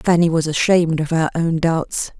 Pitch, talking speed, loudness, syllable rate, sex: 165 Hz, 190 wpm, -18 LUFS, 5.0 syllables/s, female